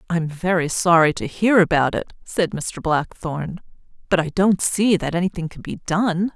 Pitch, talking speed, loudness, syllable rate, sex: 175 Hz, 190 wpm, -20 LUFS, 4.9 syllables/s, female